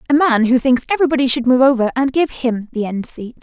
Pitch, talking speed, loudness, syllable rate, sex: 255 Hz, 245 wpm, -16 LUFS, 6.3 syllables/s, female